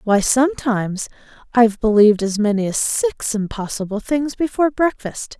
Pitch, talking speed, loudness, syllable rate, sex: 235 Hz, 135 wpm, -18 LUFS, 5.2 syllables/s, female